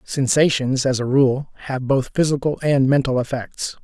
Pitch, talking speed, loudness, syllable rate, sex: 135 Hz, 155 wpm, -19 LUFS, 4.6 syllables/s, male